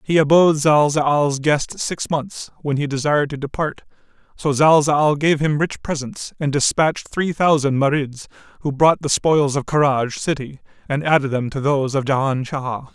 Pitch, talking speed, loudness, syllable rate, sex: 145 Hz, 170 wpm, -19 LUFS, 4.7 syllables/s, male